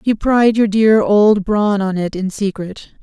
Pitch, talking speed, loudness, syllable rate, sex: 205 Hz, 200 wpm, -14 LUFS, 4.2 syllables/s, female